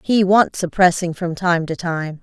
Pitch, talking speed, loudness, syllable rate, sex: 175 Hz, 190 wpm, -18 LUFS, 4.2 syllables/s, female